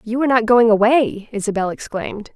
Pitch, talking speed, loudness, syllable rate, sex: 225 Hz, 155 wpm, -17 LUFS, 5.4 syllables/s, female